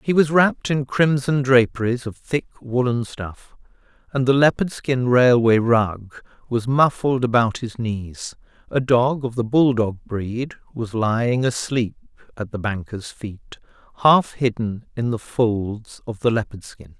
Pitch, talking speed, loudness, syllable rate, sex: 120 Hz, 155 wpm, -20 LUFS, 4.1 syllables/s, male